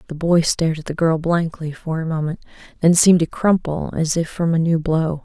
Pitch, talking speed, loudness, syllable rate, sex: 165 Hz, 230 wpm, -19 LUFS, 5.4 syllables/s, female